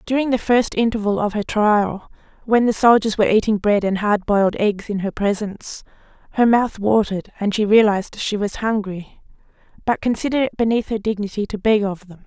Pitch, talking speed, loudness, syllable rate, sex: 210 Hz, 190 wpm, -19 LUFS, 5.6 syllables/s, female